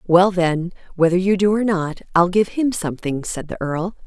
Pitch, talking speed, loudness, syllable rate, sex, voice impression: 180 Hz, 205 wpm, -19 LUFS, 4.9 syllables/s, female, very feminine, adult-like, slightly middle-aged, slightly thin, tensed, slightly weak, slightly bright, soft, clear, fluent, slightly cool, intellectual, very refreshing, sincere, very calm, friendly, very reassuring, very elegant, sweet, slightly lively, very kind, slightly intense, slightly modest